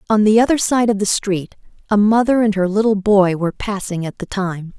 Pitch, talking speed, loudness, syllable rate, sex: 205 Hz, 225 wpm, -17 LUFS, 5.4 syllables/s, female